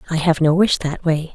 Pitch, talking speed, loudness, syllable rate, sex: 165 Hz, 270 wpm, -18 LUFS, 5.3 syllables/s, female